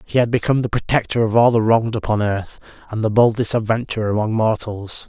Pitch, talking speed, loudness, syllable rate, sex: 110 Hz, 200 wpm, -18 LUFS, 6.2 syllables/s, male